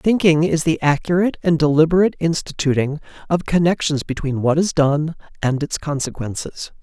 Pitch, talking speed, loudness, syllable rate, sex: 155 Hz, 140 wpm, -19 LUFS, 5.4 syllables/s, male